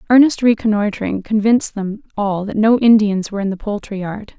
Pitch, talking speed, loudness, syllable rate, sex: 210 Hz, 180 wpm, -17 LUFS, 5.4 syllables/s, female